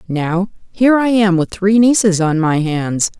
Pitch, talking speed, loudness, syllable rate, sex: 190 Hz, 190 wpm, -14 LUFS, 4.3 syllables/s, female